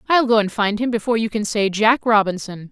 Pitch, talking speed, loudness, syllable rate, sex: 220 Hz, 245 wpm, -18 LUFS, 5.9 syllables/s, female